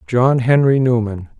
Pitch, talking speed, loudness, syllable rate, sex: 125 Hz, 130 wpm, -15 LUFS, 4.2 syllables/s, male